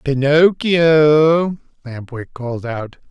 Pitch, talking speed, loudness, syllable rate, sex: 145 Hz, 95 wpm, -14 LUFS, 3.0 syllables/s, male